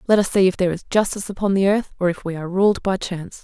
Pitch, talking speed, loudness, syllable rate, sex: 190 Hz, 295 wpm, -20 LUFS, 7.2 syllables/s, female